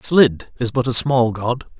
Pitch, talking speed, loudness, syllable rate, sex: 125 Hz, 200 wpm, -18 LUFS, 3.9 syllables/s, male